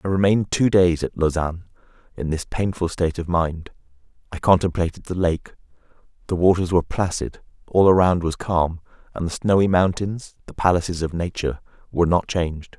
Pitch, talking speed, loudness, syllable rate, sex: 90 Hz, 165 wpm, -21 LUFS, 5.6 syllables/s, male